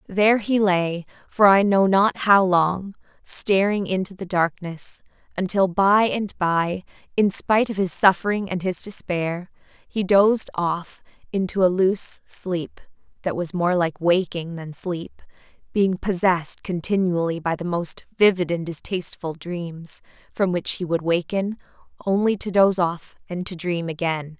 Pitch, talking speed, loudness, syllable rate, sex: 185 Hz, 155 wpm, -22 LUFS, 4.3 syllables/s, female